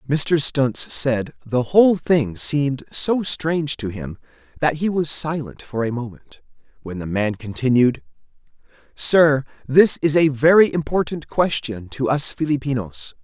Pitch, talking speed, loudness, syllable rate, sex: 140 Hz, 145 wpm, -19 LUFS, 4.2 syllables/s, male